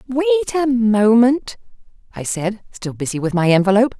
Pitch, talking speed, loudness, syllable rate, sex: 230 Hz, 150 wpm, -17 LUFS, 5.2 syllables/s, female